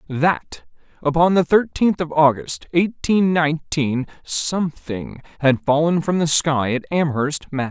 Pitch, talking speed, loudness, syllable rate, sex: 150 Hz, 130 wpm, -19 LUFS, 4.0 syllables/s, male